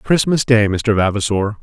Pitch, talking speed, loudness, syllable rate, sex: 110 Hz, 150 wpm, -16 LUFS, 4.5 syllables/s, male